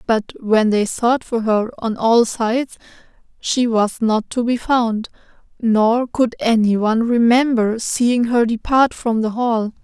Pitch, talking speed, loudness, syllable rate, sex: 230 Hz, 155 wpm, -17 LUFS, 3.7 syllables/s, female